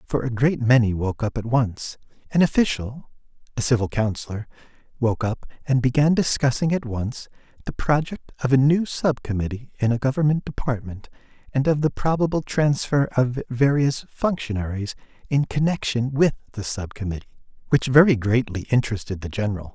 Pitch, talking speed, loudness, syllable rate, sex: 125 Hz, 145 wpm, -22 LUFS, 5.3 syllables/s, male